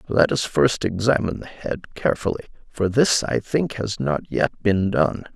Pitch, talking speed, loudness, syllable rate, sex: 105 Hz, 180 wpm, -22 LUFS, 4.5 syllables/s, male